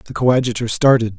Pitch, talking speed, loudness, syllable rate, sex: 120 Hz, 150 wpm, -16 LUFS, 6.1 syllables/s, male